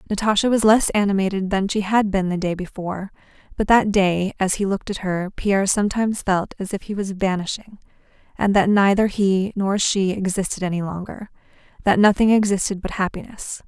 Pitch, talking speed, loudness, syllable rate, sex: 195 Hz, 180 wpm, -20 LUFS, 5.6 syllables/s, female